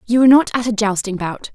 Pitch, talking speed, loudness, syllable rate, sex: 220 Hz, 270 wpm, -16 LUFS, 6.6 syllables/s, female